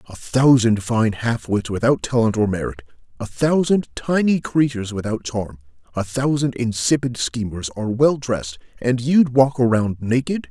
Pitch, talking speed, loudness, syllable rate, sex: 120 Hz, 155 wpm, -20 LUFS, 4.7 syllables/s, male